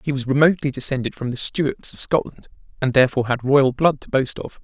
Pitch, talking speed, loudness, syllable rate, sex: 135 Hz, 220 wpm, -20 LUFS, 6.2 syllables/s, male